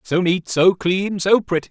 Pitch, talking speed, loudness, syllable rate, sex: 180 Hz, 210 wpm, -18 LUFS, 4.4 syllables/s, male